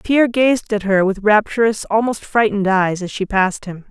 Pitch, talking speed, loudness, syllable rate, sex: 210 Hz, 200 wpm, -16 LUFS, 5.3 syllables/s, female